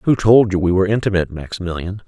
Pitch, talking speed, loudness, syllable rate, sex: 95 Hz, 200 wpm, -17 LUFS, 6.9 syllables/s, male